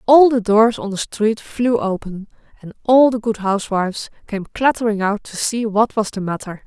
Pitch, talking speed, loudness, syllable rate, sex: 215 Hz, 200 wpm, -18 LUFS, 4.9 syllables/s, female